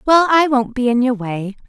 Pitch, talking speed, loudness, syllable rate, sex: 250 Hz, 250 wpm, -16 LUFS, 4.9 syllables/s, female